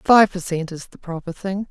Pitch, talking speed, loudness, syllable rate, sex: 180 Hz, 245 wpm, -21 LUFS, 5.0 syllables/s, female